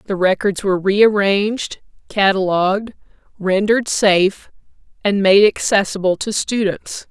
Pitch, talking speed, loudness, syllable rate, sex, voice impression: 200 Hz, 100 wpm, -16 LUFS, 4.6 syllables/s, female, very feminine, slightly gender-neutral, very adult-like, slightly middle-aged, slightly thin, very tensed, powerful, bright, hard, very clear, fluent, cool, very intellectual, refreshing, very sincere, very calm, slightly friendly, reassuring, very unique, elegant, slightly sweet, slightly lively, strict, slightly intense, sharp, light